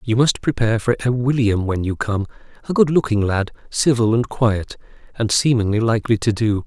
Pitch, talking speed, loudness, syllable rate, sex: 115 Hz, 190 wpm, -19 LUFS, 5.3 syllables/s, male